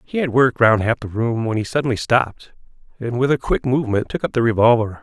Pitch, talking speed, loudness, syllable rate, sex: 120 Hz, 240 wpm, -18 LUFS, 6.3 syllables/s, male